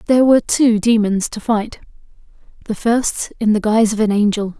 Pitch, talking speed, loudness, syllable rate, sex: 220 Hz, 170 wpm, -16 LUFS, 5.4 syllables/s, female